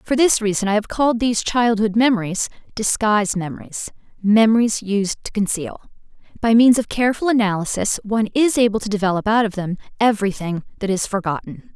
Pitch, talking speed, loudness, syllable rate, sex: 215 Hz, 165 wpm, -19 LUFS, 5.9 syllables/s, female